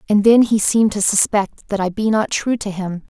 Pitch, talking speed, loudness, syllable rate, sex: 205 Hz, 245 wpm, -17 LUFS, 5.2 syllables/s, female